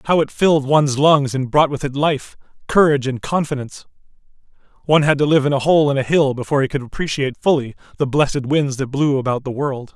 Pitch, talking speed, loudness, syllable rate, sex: 140 Hz, 215 wpm, -17 LUFS, 6.4 syllables/s, male